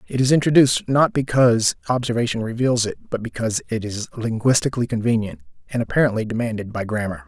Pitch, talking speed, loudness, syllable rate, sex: 120 Hz, 155 wpm, -20 LUFS, 6.5 syllables/s, male